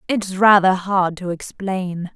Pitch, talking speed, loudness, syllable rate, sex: 190 Hz, 140 wpm, -18 LUFS, 3.6 syllables/s, female